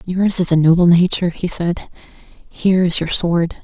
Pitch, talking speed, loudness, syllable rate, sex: 175 Hz, 180 wpm, -15 LUFS, 4.7 syllables/s, female